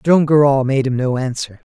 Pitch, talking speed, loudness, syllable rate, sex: 135 Hz, 210 wpm, -15 LUFS, 5.0 syllables/s, male